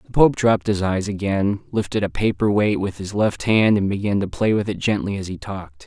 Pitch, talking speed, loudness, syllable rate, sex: 100 Hz, 245 wpm, -20 LUFS, 5.5 syllables/s, male